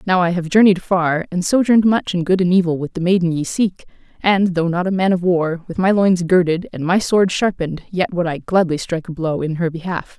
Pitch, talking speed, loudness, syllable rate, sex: 180 Hz, 245 wpm, -17 LUFS, 5.6 syllables/s, female